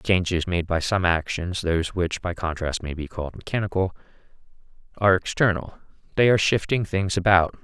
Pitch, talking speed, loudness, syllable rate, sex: 90 Hz, 165 wpm, -23 LUFS, 3.9 syllables/s, male